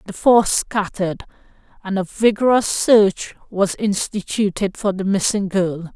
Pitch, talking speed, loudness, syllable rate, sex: 200 Hz, 130 wpm, -18 LUFS, 4.2 syllables/s, female